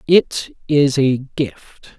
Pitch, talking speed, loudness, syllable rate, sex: 135 Hz, 120 wpm, -18 LUFS, 3.3 syllables/s, male